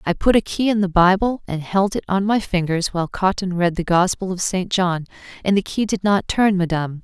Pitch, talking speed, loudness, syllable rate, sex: 190 Hz, 240 wpm, -19 LUFS, 5.4 syllables/s, female